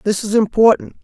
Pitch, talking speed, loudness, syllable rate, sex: 205 Hz, 175 wpm, -15 LUFS, 5.8 syllables/s, male